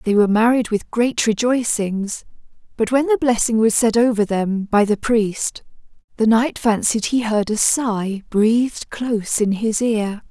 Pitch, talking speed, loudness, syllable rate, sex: 220 Hz, 170 wpm, -18 LUFS, 4.2 syllables/s, female